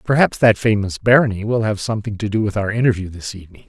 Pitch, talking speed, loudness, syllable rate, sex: 105 Hz, 230 wpm, -18 LUFS, 6.7 syllables/s, male